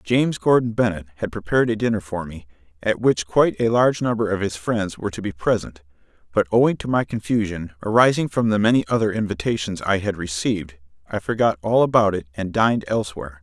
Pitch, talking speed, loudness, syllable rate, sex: 100 Hz, 195 wpm, -21 LUFS, 6.2 syllables/s, male